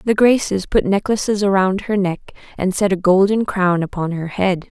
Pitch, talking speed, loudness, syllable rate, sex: 195 Hz, 190 wpm, -17 LUFS, 5.0 syllables/s, female